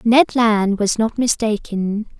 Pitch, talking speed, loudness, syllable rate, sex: 220 Hz, 135 wpm, -18 LUFS, 3.5 syllables/s, female